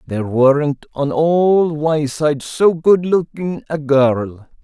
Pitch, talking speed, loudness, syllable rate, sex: 150 Hz, 130 wpm, -16 LUFS, 3.3 syllables/s, male